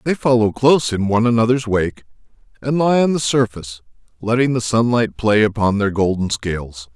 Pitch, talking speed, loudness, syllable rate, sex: 110 Hz, 175 wpm, -17 LUFS, 5.5 syllables/s, male